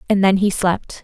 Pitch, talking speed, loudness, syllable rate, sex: 190 Hz, 235 wpm, -17 LUFS, 4.7 syllables/s, female